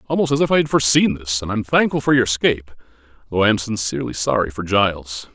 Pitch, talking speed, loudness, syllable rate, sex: 110 Hz, 260 wpm, -18 LUFS, 7.3 syllables/s, male